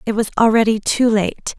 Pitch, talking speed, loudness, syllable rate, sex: 220 Hz, 190 wpm, -16 LUFS, 5.0 syllables/s, female